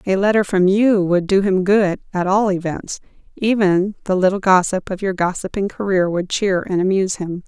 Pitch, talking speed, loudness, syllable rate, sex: 190 Hz, 195 wpm, -18 LUFS, 5.0 syllables/s, female